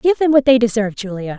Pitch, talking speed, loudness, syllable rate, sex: 240 Hz, 260 wpm, -15 LUFS, 6.7 syllables/s, female